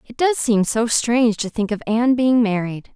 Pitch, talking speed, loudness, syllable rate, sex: 225 Hz, 225 wpm, -18 LUFS, 5.1 syllables/s, female